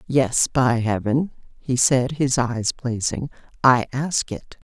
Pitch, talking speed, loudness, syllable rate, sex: 125 Hz, 140 wpm, -21 LUFS, 3.4 syllables/s, female